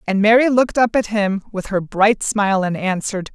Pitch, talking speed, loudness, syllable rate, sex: 205 Hz, 215 wpm, -17 LUFS, 5.5 syllables/s, female